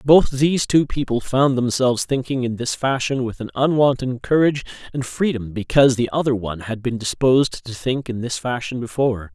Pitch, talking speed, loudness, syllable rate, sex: 125 Hz, 185 wpm, -20 LUFS, 5.5 syllables/s, male